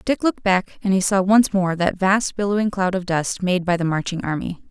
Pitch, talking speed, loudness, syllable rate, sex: 190 Hz, 240 wpm, -20 LUFS, 5.3 syllables/s, female